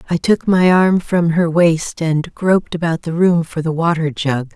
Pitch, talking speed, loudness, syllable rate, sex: 165 Hz, 210 wpm, -16 LUFS, 4.4 syllables/s, female